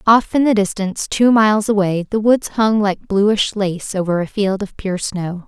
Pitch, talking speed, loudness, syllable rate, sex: 205 Hz, 210 wpm, -17 LUFS, 4.6 syllables/s, female